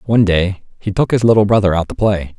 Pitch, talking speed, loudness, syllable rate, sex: 100 Hz, 250 wpm, -15 LUFS, 6.2 syllables/s, male